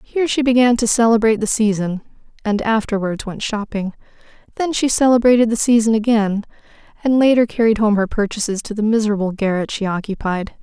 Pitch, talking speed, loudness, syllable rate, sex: 220 Hz, 165 wpm, -17 LUFS, 6.0 syllables/s, female